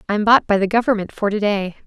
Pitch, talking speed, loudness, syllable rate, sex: 205 Hz, 255 wpm, -18 LUFS, 6.3 syllables/s, female